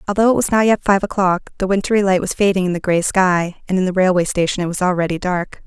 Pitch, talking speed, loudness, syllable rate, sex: 185 Hz, 265 wpm, -17 LUFS, 6.3 syllables/s, female